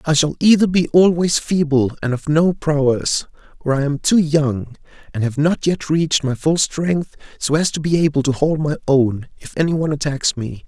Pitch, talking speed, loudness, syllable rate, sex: 150 Hz, 210 wpm, -17 LUFS, 4.9 syllables/s, male